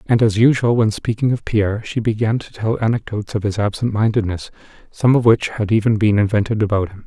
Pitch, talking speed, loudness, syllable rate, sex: 110 Hz, 210 wpm, -18 LUFS, 6.0 syllables/s, male